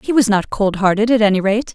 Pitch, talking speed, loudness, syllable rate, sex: 210 Hz, 275 wpm, -15 LUFS, 6.1 syllables/s, female